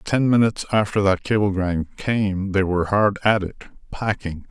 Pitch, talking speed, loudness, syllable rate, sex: 100 Hz, 160 wpm, -21 LUFS, 5.0 syllables/s, male